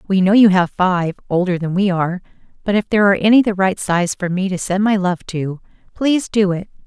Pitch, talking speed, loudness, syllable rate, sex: 190 Hz, 235 wpm, -16 LUFS, 5.8 syllables/s, female